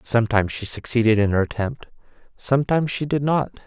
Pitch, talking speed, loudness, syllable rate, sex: 120 Hz, 165 wpm, -21 LUFS, 6.4 syllables/s, male